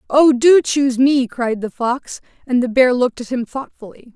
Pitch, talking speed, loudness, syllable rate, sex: 255 Hz, 200 wpm, -16 LUFS, 4.9 syllables/s, female